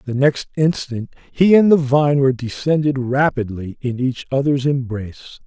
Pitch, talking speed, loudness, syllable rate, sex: 135 Hz, 155 wpm, -18 LUFS, 4.6 syllables/s, male